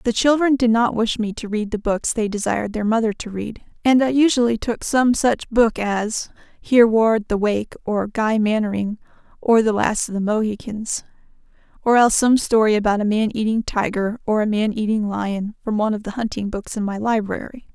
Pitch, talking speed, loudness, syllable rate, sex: 220 Hz, 200 wpm, -20 LUFS, 5.1 syllables/s, female